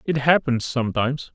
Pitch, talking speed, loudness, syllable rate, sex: 135 Hz, 135 wpm, -21 LUFS, 5.6 syllables/s, male